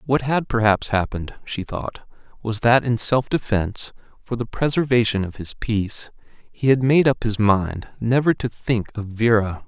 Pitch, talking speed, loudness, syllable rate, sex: 115 Hz, 175 wpm, -21 LUFS, 4.7 syllables/s, male